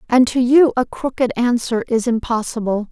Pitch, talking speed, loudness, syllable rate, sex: 240 Hz, 165 wpm, -17 LUFS, 4.9 syllables/s, female